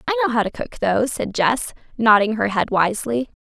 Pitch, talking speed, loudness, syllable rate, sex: 235 Hz, 210 wpm, -19 LUFS, 5.9 syllables/s, female